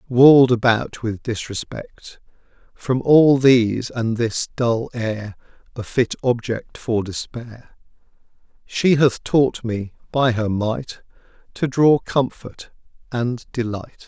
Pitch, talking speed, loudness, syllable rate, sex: 120 Hz, 120 wpm, -19 LUFS, 3.4 syllables/s, male